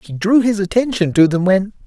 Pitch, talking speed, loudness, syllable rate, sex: 195 Hz, 225 wpm, -15 LUFS, 5.5 syllables/s, male